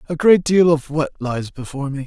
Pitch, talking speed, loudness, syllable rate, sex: 150 Hz, 230 wpm, -18 LUFS, 5.4 syllables/s, male